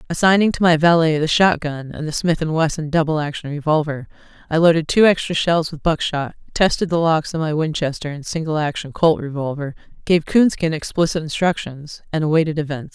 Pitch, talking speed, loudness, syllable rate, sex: 160 Hz, 185 wpm, -19 LUFS, 5.6 syllables/s, female